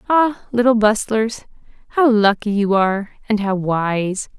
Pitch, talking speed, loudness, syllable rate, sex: 215 Hz, 135 wpm, -18 LUFS, 4.1 syllables/s, female